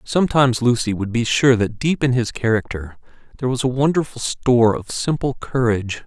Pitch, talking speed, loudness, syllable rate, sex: 120 Hz, 180 wpm, -19 LUFS, 5.6 syllables/s, male